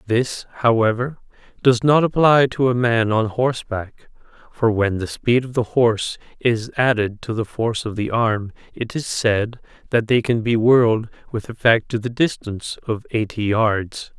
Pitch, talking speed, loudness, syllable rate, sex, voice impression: 115 Hz, 175 wpm, -19 LUFS, 4.4 syllables/s, male, very masculine, adult-like, slightly middle-aged, thick, tensed, powerful, slightly dark, slightly hard, slightly muffled, fluent, slightly raspy, cool, intellectual, refreshing, very sincere, very calm, mature, friendly, reassuring, slightly unique, slightly elegant, wild, sweet, slightly lively, very kind, slightly modest